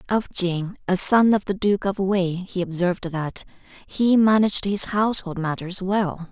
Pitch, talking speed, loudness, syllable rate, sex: 190 Hz, 170 wpm, -21 LUFS, 4.4 syllables/s, female